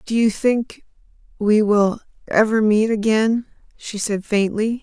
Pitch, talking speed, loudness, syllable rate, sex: 215 Hz, 110 wpm, -19 LUFS, 3.9 syllables/s, female